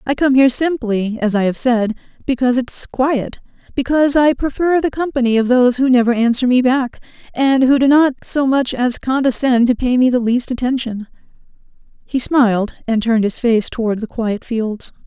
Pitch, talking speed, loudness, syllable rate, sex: 250 Hz, 185 wpm, -16 LUFS, 5.2 syllables/s, female